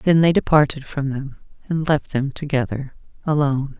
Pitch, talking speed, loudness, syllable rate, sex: 145 Hz, 160 wpm, -20 LUFS, 5.1 syllables/s, female